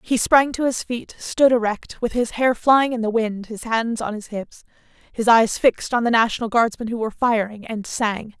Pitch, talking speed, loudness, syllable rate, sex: 230 Hz, 220 wpm, -20 LUFS, 4.9 syllables/s, female